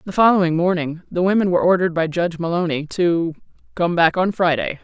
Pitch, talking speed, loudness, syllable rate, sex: 175 Hz, 185 wpm, -19 LUFS, 6.1 syllables/s, female